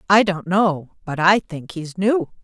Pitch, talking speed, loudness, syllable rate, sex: 180 Hz, 195 wpm, -19 LUFS, 3.8 syllables/s, female